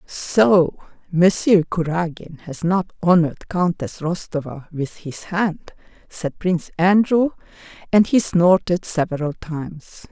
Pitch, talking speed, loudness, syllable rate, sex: 170 Hz, 115 wpm, -19 LUFS, 3.9 syllables/s, female